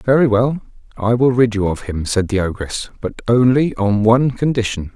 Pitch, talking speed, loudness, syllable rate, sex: 115 Hz, 195 wpm, -17 LUFS, 5.0 syllables/s, male